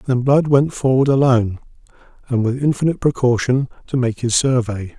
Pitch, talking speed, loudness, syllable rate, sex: 125 Hz, 155 wpm, -17 LUFS, 5.4 syllables/s, male